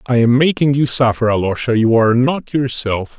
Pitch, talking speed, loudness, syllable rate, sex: 125 Hz, 190 wpm, -15 LUFS, 5.2 syllables/s, male